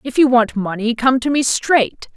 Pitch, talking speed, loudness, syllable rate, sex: 245 Hz, 220 wpm, -16 LUFS, 4.5 syllables/s, female